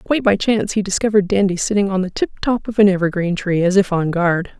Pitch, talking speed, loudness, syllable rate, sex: 195 Hz, 235 wpm, -17 LUFS, 6.2 syllables/s, female